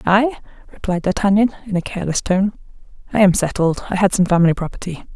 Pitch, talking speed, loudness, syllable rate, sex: 190 Hz, 165 wpm, -18 LUFS, 6.6 syllables/s, female